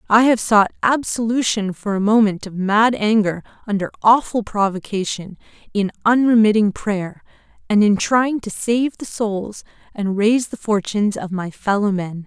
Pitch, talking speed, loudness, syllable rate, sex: 210 Hz, 150 wpm, -18 LUFS, 4.6 syllables/s, female